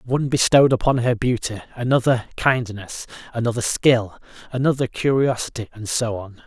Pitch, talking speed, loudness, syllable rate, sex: 120 Hz, 130 wpm, -20 LUFS, 5.3 syllables/s, male